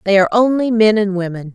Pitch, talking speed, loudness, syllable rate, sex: 205 Hz, 235 wpm, -15 LUFS, 6.5 syllables/s, female